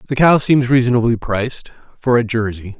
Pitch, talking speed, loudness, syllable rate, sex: 120 Hz, 170 wpm, -16 LUFS, 5.5 syllables/s, male